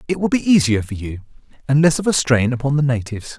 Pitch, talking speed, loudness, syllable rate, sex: 135 Hz, 250 wpm, -17 LUFS, 6.5 syllables/s, male